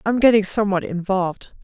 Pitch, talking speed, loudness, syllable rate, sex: 200 Hz, 145 wpm, -19 LUFS, 6.1 syllables/s, female